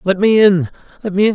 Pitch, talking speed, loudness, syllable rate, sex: 190 Hz, 270 wpm, -14 LUFS, 6.1 syllables/s, male